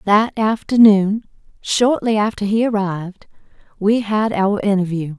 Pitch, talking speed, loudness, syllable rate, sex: 205 Hz, 115 wpm, -17 LUFS, 4.3 syllables/s, female